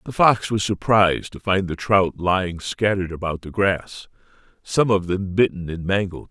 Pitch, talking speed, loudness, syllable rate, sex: 95 Hz, 180 wpm, -21 LUFS, 4.8 syllables/s, male